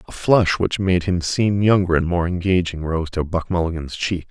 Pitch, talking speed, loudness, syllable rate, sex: 90 Hz, 210 wpm, -20 LUFS, 4.9 syllables/s, male